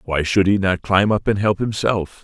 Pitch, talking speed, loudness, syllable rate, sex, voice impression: 100 Hz, 240 wpm, -18 LUFS, 4.7 syllables/s, male, very masculine, very adult-like, very middle-aged, very thick, tensed, powerful, slightly bright, slightly hard, slightly muffled, slightly fluent, cool, intellectual, sincere, calm, very mature, friendly, reassuring, slightly unique, very wild, slightly sweet, slightly lively, slightly strict, slightly sharp